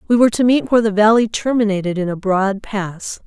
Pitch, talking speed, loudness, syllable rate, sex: 210 Hz, 220 wpm, -16 LUFS, 5.9 syllables/s, female